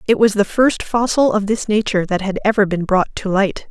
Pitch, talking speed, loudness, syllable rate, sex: 205 Hz, 245 wpm, -17 LUFS, 5.5 syllables/s, female